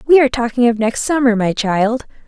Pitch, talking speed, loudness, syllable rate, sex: 240 Hz, 210 wpm, -15 LUFS, 5.6 syllables/s, female